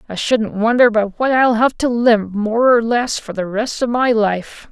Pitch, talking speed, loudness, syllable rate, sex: 230 Hz, 230 wpm, -16 LUFS, 4.2 syllables/s, female